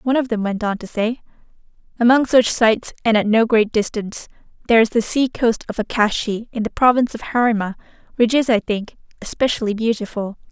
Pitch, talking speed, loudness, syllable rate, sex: 225 Hz, 190 wpm, -18 LUFS, 5.9 syllables/s, female